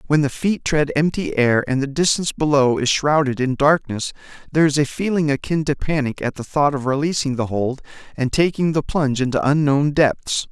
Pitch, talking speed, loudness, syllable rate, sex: 145 Hz, 200 wpm, -19 LUFS, 5.3 syllables/s, male